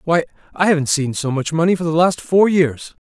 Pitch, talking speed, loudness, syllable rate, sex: 160 Hz, 235 wpm, -17 LUFS, 5.5 syllables/s, male